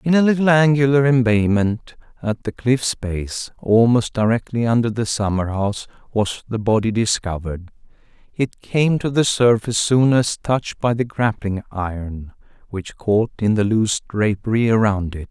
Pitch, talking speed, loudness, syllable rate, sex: 115 Hz, 155 wpm, -19 LUFS, 4.7 syllables/s, male